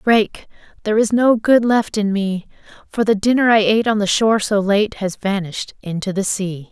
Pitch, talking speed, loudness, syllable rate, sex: 210 Hz, 205 wpm, -17 LUFS, 5.2 syllables/s, female